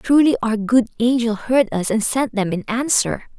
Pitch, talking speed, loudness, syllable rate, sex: 230 Hz, 195 wpm, -18 LUFS, 4.9 syllables/s, female